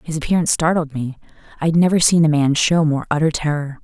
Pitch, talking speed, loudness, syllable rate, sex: 155 Hz, 220 wpm, -17 LUFS, 6.4 syllables/s, female